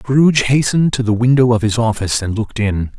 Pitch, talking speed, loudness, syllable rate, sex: 120 Hz, 220 wpm, -15 LUFS, 6.1 syllables/s, male